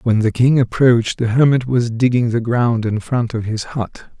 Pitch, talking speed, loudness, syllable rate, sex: 120 Hz, 215 wpm, -16 LUFS, 4.8 syllables/s, male